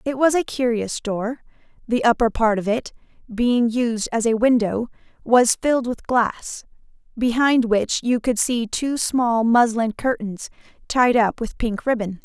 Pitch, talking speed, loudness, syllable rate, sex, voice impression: 235 Hz, 160 wpm, -20 LUFS, 4.1 syllables/s, female, feminine, adult-like, slightly tensed, powerful, fluent, slightly raspy, intellectual, calm, slightly reassuring, elegant, lively, slightly sharp